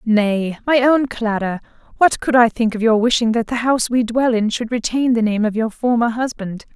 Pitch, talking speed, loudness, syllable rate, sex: 230 Hz, 205 wpm, -17 LUFS, 5.2 syllables/s, female